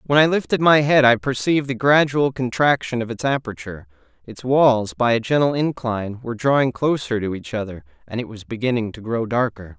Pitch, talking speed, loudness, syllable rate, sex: 125 Hz, 195 wpm, -19 LUFS, 5.7 syllables/s, male